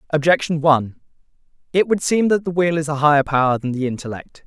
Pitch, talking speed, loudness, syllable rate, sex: 155 Hz, 200 wpm, -18 LUFS, 6.3 syllables/s, male